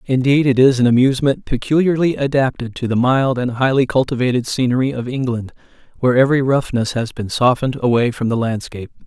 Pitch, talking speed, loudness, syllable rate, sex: 125 Hz, 170 wpm, -17 LUFS, 6.1 syllables/s, male